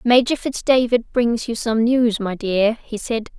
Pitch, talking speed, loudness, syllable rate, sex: 230 Hz, 195 wpm, -19 LUFS, 4.1 syllables/s, female